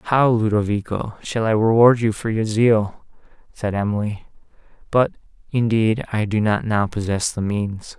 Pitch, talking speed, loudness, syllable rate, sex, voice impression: 110 Hz, 150 wpm, -20 LUFS, 4.4 syllables/s, male, masculine, adult-like, slightly relaxed, weak, dark, clear, cool, sincere, calm, friendly, kind, modest